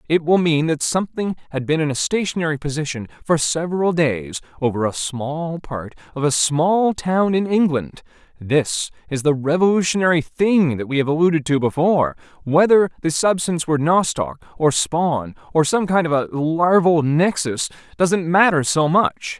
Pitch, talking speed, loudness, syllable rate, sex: 160 Hz, 165 wpm, -19 LUFS, 4.8 syllables/s, male